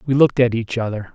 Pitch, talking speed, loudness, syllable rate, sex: 120 Hz, 260 wpm, -18 LUFS, 7.1 syllables/s, male